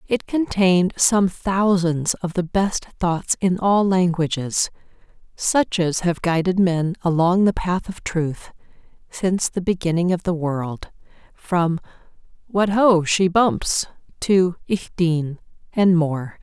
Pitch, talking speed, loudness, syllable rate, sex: 180 Hz, 135 wpm, -20 LUFS, 3.7 syllables/s, female